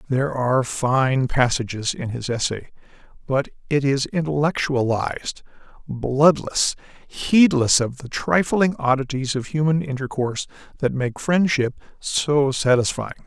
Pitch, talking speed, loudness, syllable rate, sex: 135 Hz, 115 wpm, -21 LUFS, 4.3 syllables/s, male